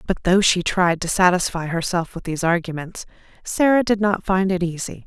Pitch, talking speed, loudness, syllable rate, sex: 180 Hz, 190 wpm, -20 LUFS, 5.4 syllables/s, female